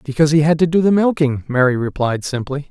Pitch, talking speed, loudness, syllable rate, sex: 145 Hz, 220 wpm, -16 LUFS, 6.2 syllables/s, male